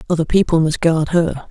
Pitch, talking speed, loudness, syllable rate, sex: 165 Hz, 200 wpm, -16 LUFS, 5.4 syllables/s, female